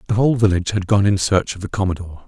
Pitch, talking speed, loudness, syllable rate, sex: 100 Hz, 265 wpm, -18 LUFS, 7.7 syllables/s, male